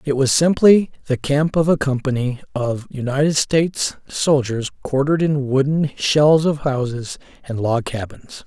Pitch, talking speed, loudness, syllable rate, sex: 140 Hz, 150 wpm, -18 LUFS, 4.4 syllables/s, male